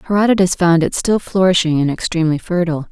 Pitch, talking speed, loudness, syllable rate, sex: 175 Hz, 165 wpm, -15 LUFS, 6.7 syllables/s, female